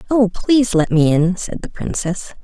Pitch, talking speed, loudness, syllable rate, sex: 200 Hz, 195 wpm, -17 LUFS, 5.0 syllables/s, female